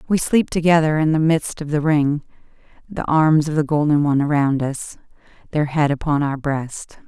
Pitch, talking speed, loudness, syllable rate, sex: 150 Hz, 185 wpm, -19 LUFS, 5.0 syllables/s, female